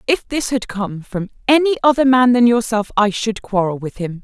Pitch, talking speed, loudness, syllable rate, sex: 225 Hz, 215 wpm, -17 LUFS, 5.1 syllables/s, female